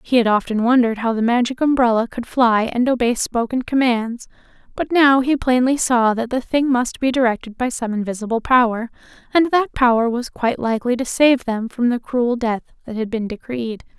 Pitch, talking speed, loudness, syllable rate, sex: 240 Hz, 195 wpm, -18 LUFS, 5.3 syllables/s, female